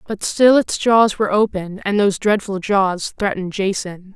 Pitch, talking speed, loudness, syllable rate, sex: 200 Hz, 175 wpm, -17 LUFS, 4.8 syllables/s, female